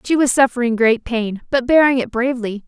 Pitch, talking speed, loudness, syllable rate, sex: 245 Hz, 200 wpm, -16 LUFS, 5.7 syllables/s, female